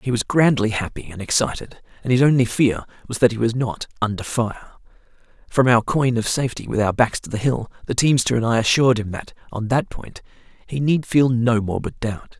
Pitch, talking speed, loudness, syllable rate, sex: 120 Hz, 215 wpm, -20 LUFS, 5.5 syllables/s, male